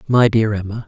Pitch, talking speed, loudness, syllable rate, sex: 110 Hz, 205 wpm, -17 LUFS, 5.6 syllables/s, male